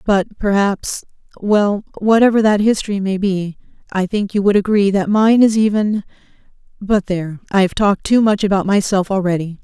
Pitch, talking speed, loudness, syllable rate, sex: 200 Hz, 150 wpm, -16 LUFS, 5.1 syllables/s, female